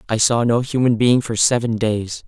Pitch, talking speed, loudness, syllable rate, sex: 115 Hz, 210 wpm, -17 LUFS, 4.8 syllables/s, male